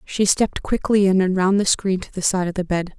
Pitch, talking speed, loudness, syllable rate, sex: 190 Hz, 280 wpm, -19 LUFS, 5.5 syllables/s, female